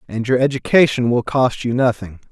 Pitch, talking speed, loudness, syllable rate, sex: 120 Hz, 180 wpm, -17 LUFS, 5.3 syllables/s, male